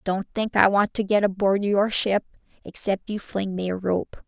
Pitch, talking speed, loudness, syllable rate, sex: 200 Hz, 210 wpm, -23 LUFS, 4.5 syllables/s, female